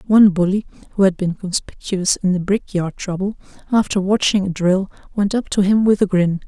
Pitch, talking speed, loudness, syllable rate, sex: 190 Hz, 195 wpm, -18 LUFS, 5.4 syllables/s, female